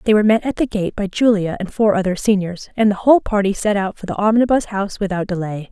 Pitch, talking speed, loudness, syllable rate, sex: 205 Hz, 250 wpm, -18 LUFS, 6.4 syllables/s, female